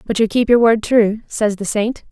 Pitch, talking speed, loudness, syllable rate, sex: 220 Hz, 255 wpm, -16 LUFS, 4.8 syllables/s, female